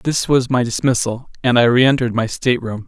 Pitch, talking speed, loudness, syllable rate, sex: 125 Hz, 190 wpm, -16 LUFS, 5.6 syllables/s, male